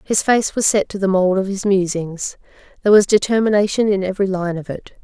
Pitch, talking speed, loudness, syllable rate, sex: 195 Hz, 215 wpm, -17 LUFS, 6.1 syllables/s, female